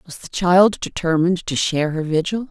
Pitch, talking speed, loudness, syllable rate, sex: 170 Hz, 190 wpm, -18 LUFS, 5.4 syllables/s, female